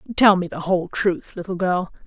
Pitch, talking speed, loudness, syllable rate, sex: 185 Hz, 205 wpm, -21 LUFS, 5.7 syllables/s, female